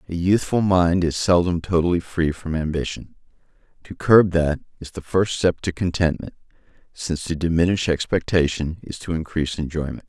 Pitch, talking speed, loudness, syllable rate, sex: 85 Hz, 155 wpm, -21 LUFS, 5.3 syllables/s, male